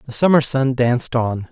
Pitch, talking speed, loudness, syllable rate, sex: 130 Hz, 200 wpm, -17 LUFS, 5.1 syllables/s, male